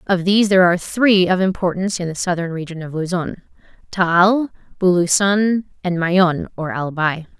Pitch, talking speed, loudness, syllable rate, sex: 180 Hz, 145 wpm, -17 LUFS, 5.1 syllables/s, female